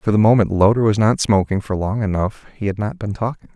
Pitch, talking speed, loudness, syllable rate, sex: 105 Hz, 255 wpm, -18 LUFS, 5.9 syllables/s, male